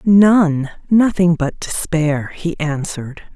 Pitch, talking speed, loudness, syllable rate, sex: 165 Hz, 90 wpm, -16 LUFS, 3.4 syllables/s, female